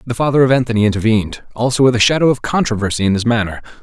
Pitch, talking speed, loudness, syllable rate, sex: 120 Hz, 220 wpm, -15 LUFS, 7.7 syllables/s, male